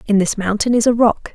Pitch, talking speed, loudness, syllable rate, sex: 215 Hz, 265 wpm, -16 LUFS, 5.7 syllables/s, female